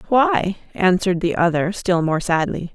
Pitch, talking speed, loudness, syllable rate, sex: 185 Hz, 155 wpm, -19 LUFS, 4.7 syllables/s, female